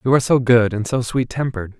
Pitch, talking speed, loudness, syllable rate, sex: 120 Hz, 265 wpm, -18 LUFS, 6.7 syllables/s, male